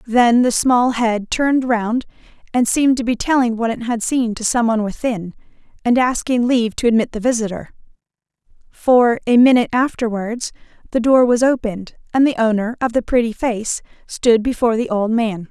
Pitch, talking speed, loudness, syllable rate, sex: 235 Hz, 180 wpm, -17 LUFS, 5.3 syllables/s, female